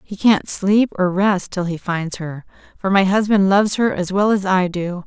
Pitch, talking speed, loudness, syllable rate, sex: 190 Hz, 225 wpm, -18 LUFS, 4.6 syllables/s, female